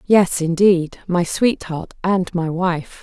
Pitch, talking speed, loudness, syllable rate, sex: 180 Hz, 140 wpm, -19 LUFS, 3.3 syllables/s, female